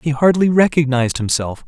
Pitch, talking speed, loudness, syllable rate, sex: 145 Hz, 145 wpm, -16 LUFS, 5.5 syllables/s, male